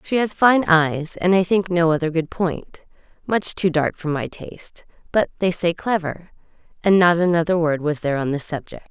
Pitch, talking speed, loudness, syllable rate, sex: 170 Hz, 180 wpm, -20 LUFS, 4.9 syllables/s, female